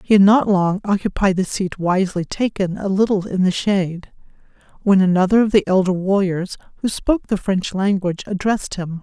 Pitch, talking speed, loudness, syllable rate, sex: 195 Hz, 180 wpm, -18 LUFS, 5.5 syllables/s, female